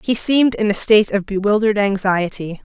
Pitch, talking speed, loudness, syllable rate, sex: 205 Hz, 175 wpm, -16 LUFS, 5.9 syllables/s, female